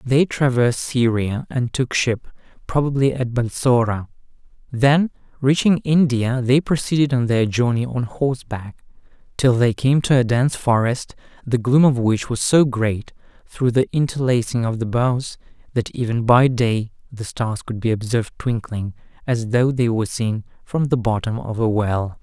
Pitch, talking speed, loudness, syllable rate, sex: 120 Hz, 160 wpm, -19 LUFS, 4.6 syllables/s, male